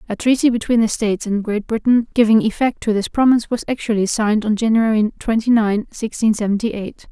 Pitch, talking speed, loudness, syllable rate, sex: 220 Hz, 195 wpm, -17 LUFS, 5.9 syllables/s, female